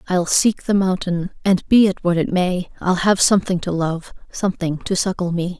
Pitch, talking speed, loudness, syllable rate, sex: 180 Hz, 205 wpm, -19 LUFS, 5.0 syllables/s, female